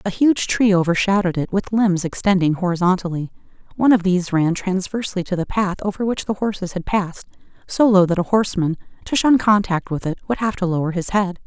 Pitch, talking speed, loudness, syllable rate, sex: 190 Hz, 200 wpm, -19 LUFS, 6.1 syllables/s, female